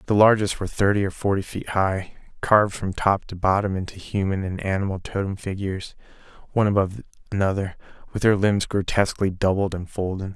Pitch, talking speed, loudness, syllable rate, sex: 100 Hz, 170 wpm, -23 LUFS, 6.0 syllables/s, male